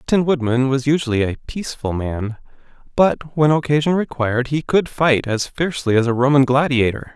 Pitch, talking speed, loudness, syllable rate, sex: 135 Hz, 175 wpm, -18 LUFS, 5.4 syllables/s, male